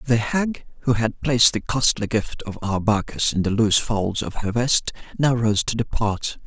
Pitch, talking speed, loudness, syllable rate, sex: 115 Hz, 195 wpm, -21 LUFS, 4.7 syllables/s, male